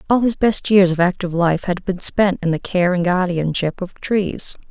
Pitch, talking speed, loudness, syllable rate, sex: 185 Hz, 215 wpm, -18 LUFS, 4.8 syllables/s, female